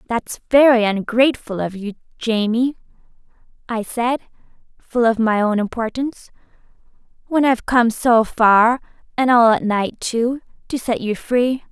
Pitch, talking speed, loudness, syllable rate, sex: 235 Hz, 140 wpm, -18 LUFS, 4.5 syllables/s, female